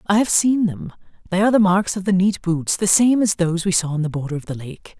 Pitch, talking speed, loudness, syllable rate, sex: 185 Hz, 290 wpm, -18 LUFS, 6.0 syllables/s, female